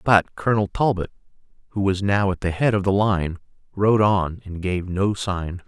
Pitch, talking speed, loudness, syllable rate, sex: 95 Hz, 190 wpm, -22 LUFS, 4.7 syllables/s, male